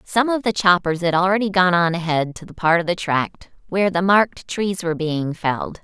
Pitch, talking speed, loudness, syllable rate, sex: 180 Hz, 225 wpm, -19 LUFS, 5.4 syllables/s, female